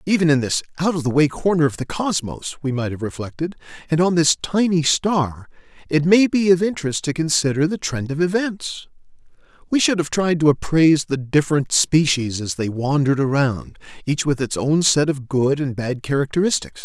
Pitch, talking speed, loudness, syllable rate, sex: 155 Hz, 190 wpm, -19 LUFS, 5.3 syllables/s, male